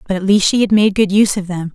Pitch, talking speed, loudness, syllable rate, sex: 195 Hz, 345 wpm, -14 LUFS, 6.9 syllables/s, female